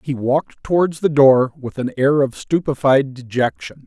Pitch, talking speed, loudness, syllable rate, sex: 140 Hz, 170 wpm, -17 LUFS, 4.7 syllables/s, male